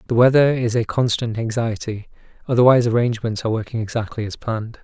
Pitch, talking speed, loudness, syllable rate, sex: 115 Hz, 160 wpm, -19 LUFS, 6.6 syllables/s, male